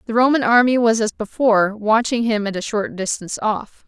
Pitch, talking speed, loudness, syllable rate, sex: 220 Hz, 200 wpm, -18 LUFS, 5.4 syllables/s, female